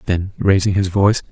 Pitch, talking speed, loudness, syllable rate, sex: 95 Hz, 185 wpm, -17 LUFS, 5.7 syllables/s, male